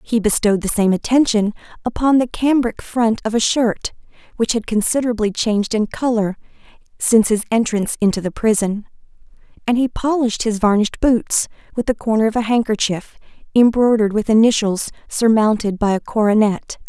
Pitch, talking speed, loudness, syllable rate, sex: 220 Hz, 155 wpm, -17 LUFS, 5.6 syllables/s, female